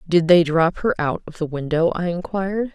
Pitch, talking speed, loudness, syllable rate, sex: 170 Hz, 220 wpm, -20 LUFS, 5.3 syllables/s, female